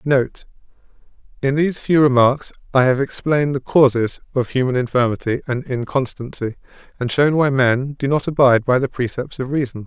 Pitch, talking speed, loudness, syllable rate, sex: 130 Hz, 160 wpm, -18 LUFS, 5.4 syllables/s, male